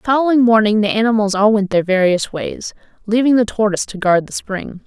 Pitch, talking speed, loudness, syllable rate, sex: 215 Hz, 210 wpm, -15 LUFS, 5.9 syllables/s, female